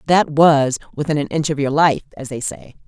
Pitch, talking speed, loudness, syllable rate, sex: 145 Hz, 230 wpm, -17 LUFS, 5.2 syllables/s, female